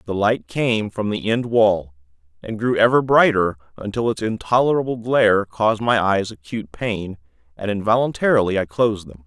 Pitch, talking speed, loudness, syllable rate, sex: 105 Hz, 160 wpm, -19 LUFS, 5.2 syllables/s, male